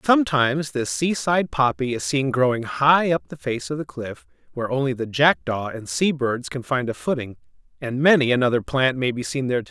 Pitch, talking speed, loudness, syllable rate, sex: 130 Hz, 210 wpm, -22 LUFS, 5.5 syllables/s, male